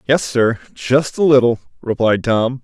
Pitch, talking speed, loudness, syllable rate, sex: 120 Hz, 135 wpm, -16 LUFS, 4.3 syllables/s, male